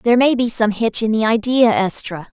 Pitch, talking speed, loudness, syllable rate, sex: 220 Hz, 225 wpm, -16 LUFS, 5.2 syllables/s, female